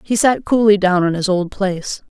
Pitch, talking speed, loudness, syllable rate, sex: 195 Hz, 230 wpm, -16 LUFS, 5.1 syllables/s, female